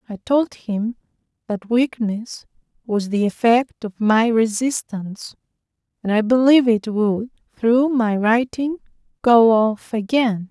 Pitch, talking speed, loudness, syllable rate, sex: 230 Hz, 125 wpm, -19 LUFS, 3.8 syllables/s, female